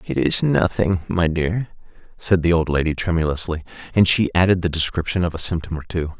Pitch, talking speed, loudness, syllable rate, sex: 85 Hz, 195 wpm, -20 LUFS, 5.6 syllables/s, male